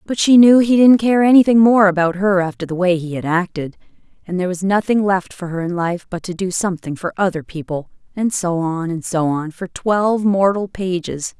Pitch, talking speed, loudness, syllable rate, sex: 185 Hz, 220 wpm, -16 LUFS, 5.4 syllables/s, female